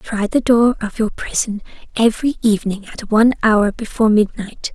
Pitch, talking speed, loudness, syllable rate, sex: 220 Hz, 165 wpm, -17 LUFS, 5.3 syllables/s, female